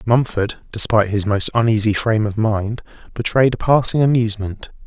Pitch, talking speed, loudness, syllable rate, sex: 110 Hz, 150 wpm, -17 LUFS, 5.5 syllables/s, male